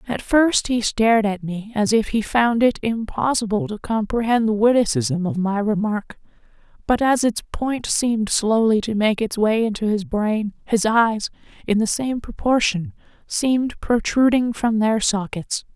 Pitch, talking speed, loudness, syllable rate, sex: 220 Hz, 165 wpm, -20 LUFS, 4.3 syllables/s, female